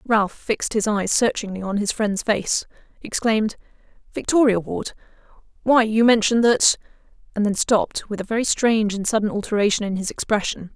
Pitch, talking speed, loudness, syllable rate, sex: 215 Hz, 160 wpm, -21 LUFS, 5.6 syllables/s, female